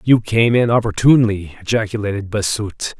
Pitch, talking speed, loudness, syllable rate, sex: 110 Hz, 120 wpm, -17 LUFS, 5.3 syllables/s, male